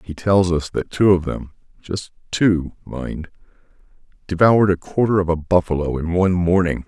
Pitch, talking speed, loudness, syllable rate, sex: 90 Hz, 150 wpm, -19 LUFS, 5.0 syllables/s, male